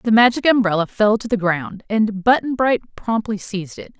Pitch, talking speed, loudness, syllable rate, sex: 215 Hz, 195 wpm, -18 LUFS, 5.1 syllables/s, female